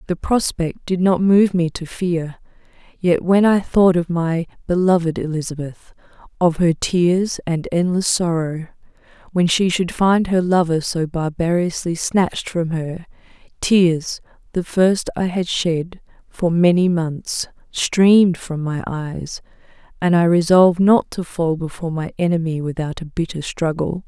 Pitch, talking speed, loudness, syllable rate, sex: 170 Hz, 145 wpm, -18 LUFS, 4.2 syllables/s, female